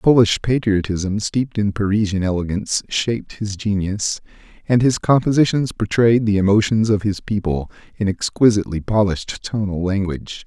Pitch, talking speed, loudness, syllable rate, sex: 105 Hz, 130 wpm, -19 LUFS, 5.2 syllables/s, male